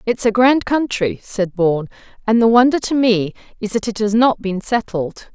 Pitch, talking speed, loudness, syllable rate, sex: 220 Hz, 200 wpm, -17 LUFS, 4.8 syllables/s, female